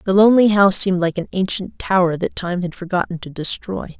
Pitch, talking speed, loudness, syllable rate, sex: 185 Hz, 210 wpm, -18 LUFS, 6.0 syllables/s, female